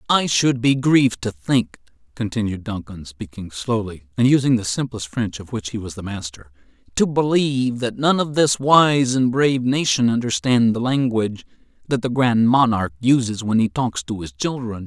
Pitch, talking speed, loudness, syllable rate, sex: 115 Hz, 180 wpm, -20 LUFS, 5.0 syllables/s, male